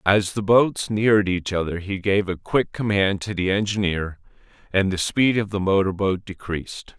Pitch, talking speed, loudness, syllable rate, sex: 100 Hz, 190 wpm, -22 LUFS, 4.7 syllables/s, male